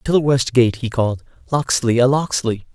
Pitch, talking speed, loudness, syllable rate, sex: 125 Hz, 195 wpm, -18 LUFS, 5.0 syllables/s, male